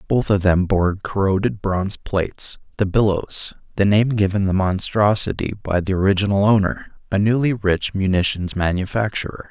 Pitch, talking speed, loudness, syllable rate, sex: 100 Hz, 145 wpm, -19 LUFS, 5.0 syllables/s, male